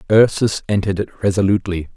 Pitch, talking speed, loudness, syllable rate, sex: 95 Hz, 120 wpm, -18 LUFS, 6.8 syllables/s, male